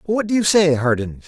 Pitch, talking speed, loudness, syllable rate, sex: 160 Hz, 235 wpm, -17 LUFS, 6.3 syllables/s, male